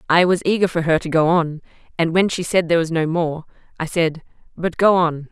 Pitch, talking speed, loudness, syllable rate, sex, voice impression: 170 Hz, 235 wpm, -19 LUFS, 5.6 syllables/s, female, feminine, adult-like, tensed, slightly powerful, clear, slightly halting, intellectual, calm, friendly, lively